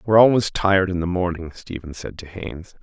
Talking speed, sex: 210 wpm, male